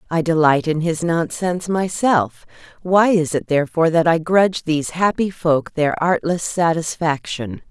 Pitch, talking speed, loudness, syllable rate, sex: 165 Hz, 150 wpm, -18 LUFS, 4.7 syllables/s, female